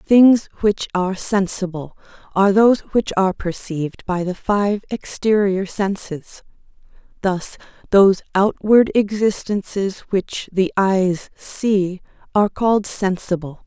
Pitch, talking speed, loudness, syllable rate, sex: 195 Hz, 110 wpm, -19 LUFS, 4.1 syllables/s, female